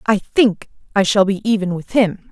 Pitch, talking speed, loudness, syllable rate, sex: 200 Hz, 205 wpm, -17 LUFS, 4.8 syllables/s, female